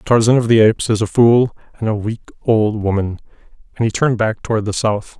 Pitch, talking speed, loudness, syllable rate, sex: 110 Hz, 220 wpm, -16 LUFS, 5.7 syllables/s, male